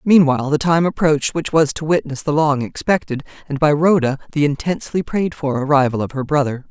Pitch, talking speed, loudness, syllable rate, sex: 150 Hz, 195 wpm, -18 LUFS, 5.8 syllables/s, female